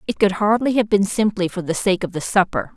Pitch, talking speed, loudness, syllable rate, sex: 195 Hz, 260 wpm, -19 LUFS, 5.8 syllables/s, female